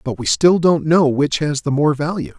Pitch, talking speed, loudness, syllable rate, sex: 150 Hz, 250 wpm, -16 LUFS, 4.8 syllables/s, male